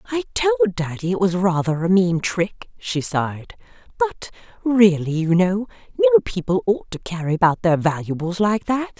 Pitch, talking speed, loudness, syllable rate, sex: 185 Hz, 165 wpm, -20 LUFS, 4.8 syllables/s, female